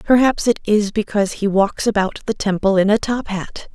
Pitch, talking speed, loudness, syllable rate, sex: 205 Hz, 210 wpm, -18 LUFS, 5.1 syllables/s, female